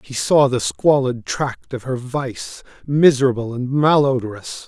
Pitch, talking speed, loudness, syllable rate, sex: 130 Hz, 140 wpm, -18 LUFS, 4.1 syllables/s, male